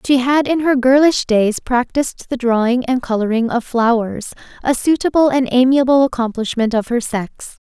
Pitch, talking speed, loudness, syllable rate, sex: 250 Hz, 165 wpm, -16 LUFS, 4.9 syllables/s, female